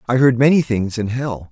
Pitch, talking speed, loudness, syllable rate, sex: 120 Hz, 240 wpm, -17 LUFS, 5.2 syllables/s, male